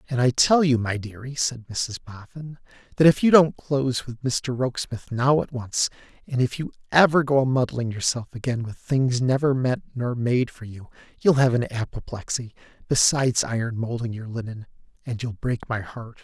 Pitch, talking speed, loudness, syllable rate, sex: 125 Hz, 180 wpm, -23 LUFS, 5.0 syllables/s, male